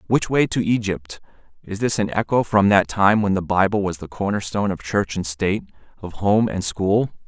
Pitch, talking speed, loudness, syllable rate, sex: 100 Hz, 215 wpm, -20 LUFS, 5.1 syllables/s, male